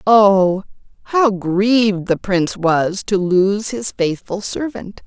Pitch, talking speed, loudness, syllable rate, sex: 200 Hz, 130 wpm, -17 LUFS, 3.4 syllables/s, female